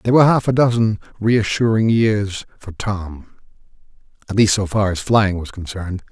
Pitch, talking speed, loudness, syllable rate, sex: 105 Hz, 155 wpm, -18 LUFS, 5.3 syllables/s, male